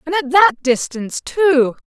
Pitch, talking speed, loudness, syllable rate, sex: 300 Hz, 160 wpm, -16 LUFS, 4.2 syllables/s, female